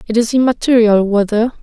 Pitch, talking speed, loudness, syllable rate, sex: 225 Hz, 150 wpm, -13 LUFS, 5.6 syllables/s, female